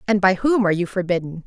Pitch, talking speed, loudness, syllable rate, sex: 195 Hz, 245 wpm, -20 LUFS, 6.9 syllables/s, female